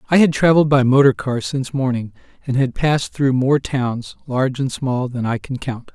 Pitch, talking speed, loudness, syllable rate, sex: 130 Hz, 210 wpm, -18 LUFS, 5.3 syllables/s, male